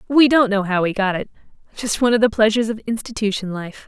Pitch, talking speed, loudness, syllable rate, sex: 215 Hz, 215 wpm, -19 LUFS, 6.6 syllables/s, female